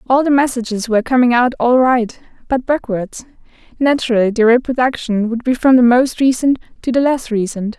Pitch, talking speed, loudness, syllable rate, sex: 245 Hz, 175 wpm, -15 LUFS, 5.5 syllables/s, female